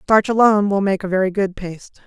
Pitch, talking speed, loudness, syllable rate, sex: 195 Hz, 235 wpm, -17 LUFS, 6.1 syllables/s, female